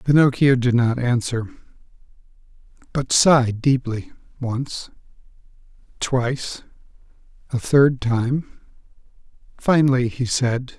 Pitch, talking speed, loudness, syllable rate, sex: 125 Hz, 70 wpm, -20 LUFS, 3.9 syllables/s, male